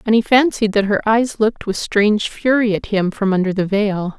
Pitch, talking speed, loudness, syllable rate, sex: 210 Hz, 230 wpm, -17 LUFS, 5.2 syllables/s, female